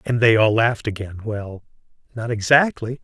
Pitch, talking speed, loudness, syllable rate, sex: 115 Hz, 160 wpm, -19 LUFS, 5.0 syllables/s, male